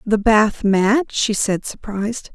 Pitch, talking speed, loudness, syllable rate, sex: 215 Hz, 155 wpm, -18 LUFS, 3.6 syllables/s, female